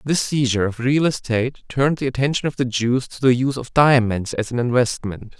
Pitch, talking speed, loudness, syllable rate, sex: 125 Hz, 210 wpm, -20 LUFS, 5.9 syllables/s, male